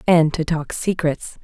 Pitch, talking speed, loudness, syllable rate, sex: 165 Hz, 165 wpm, -20 LUFS, 3.9 syllables/s, female